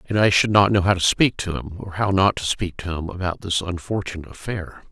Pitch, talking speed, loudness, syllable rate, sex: 90 Hz, 255 wpm, -21 LUFS, 5.9 syllables/s, male